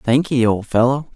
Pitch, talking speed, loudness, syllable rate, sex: 125 Hz, 155 wpm, -17 LUFS, 4.7 syllables/s, male